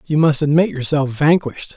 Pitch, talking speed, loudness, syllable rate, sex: 150 Hz, 170 wpm, -16 LUFS, 5.5 syllables/s, male